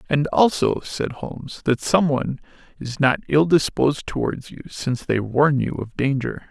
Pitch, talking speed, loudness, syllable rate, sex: 135 Hz, 165 wpm, -21 LUFS, 4.7 syllables/s, male